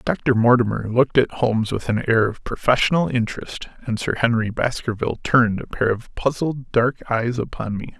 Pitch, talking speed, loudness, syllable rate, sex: 120 Hz, 180 wpm, -21 LUFS, 5.2 syllables/s, male